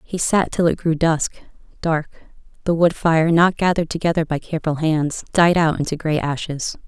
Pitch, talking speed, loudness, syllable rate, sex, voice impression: 160 Hz, 185 wpm, -19 LUFS, 5.1 syllables/s, female, feminine, middle-aged, tensed, slightly dark, clear, intellectual, calm, elegant, sharp, modest